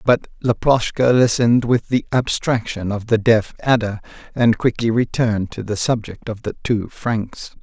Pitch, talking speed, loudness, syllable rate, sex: 115 Hz, 155 wpm, -19 LUFS, 4.6 syllables/s, male